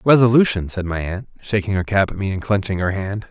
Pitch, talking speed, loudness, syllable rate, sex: 100 Hz, 255 wpm, -19 LUFS, 6.1 syllables/s, male